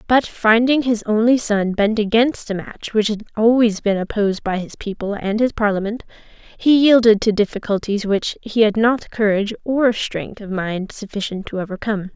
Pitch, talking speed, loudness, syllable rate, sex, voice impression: 215 Hz, 180 wpm, -18 LUFS, 5.0 syllables/s, female, very feminine, young, slightly adult-like, very thin, tensed, slightly weak, very bright, slightly soft, very clear, fluent, very cute, very intellectual, refreshing, very sincere, calm, very friendly, very reassuring, very unique, very elegant, slightly wild, very sweet, lively, very kind, slightly intense, slightly sharp, light